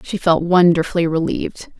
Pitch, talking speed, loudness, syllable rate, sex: 170 Hz, 135 wpm, -16 LUFS, 5.4 syllables/s, female